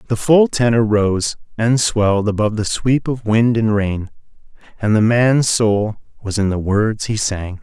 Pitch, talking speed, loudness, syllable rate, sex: 110 Hz, 180 wpm, -16 LUFS, 4.2 syllables/s, male